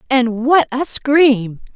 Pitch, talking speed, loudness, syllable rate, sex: 255 Hz, 135 wpm, -15 LUFS, 2.9 syllables/s, female